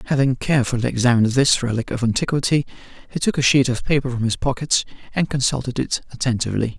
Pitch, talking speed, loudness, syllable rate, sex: 130 Hz, 175 wpm, -20 LUFS, 6.8 syllables/s, male